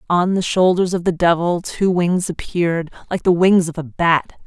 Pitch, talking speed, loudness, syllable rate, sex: 175 Hz, 200 wpm, -18 LUFS, 4.8 syllables/s, female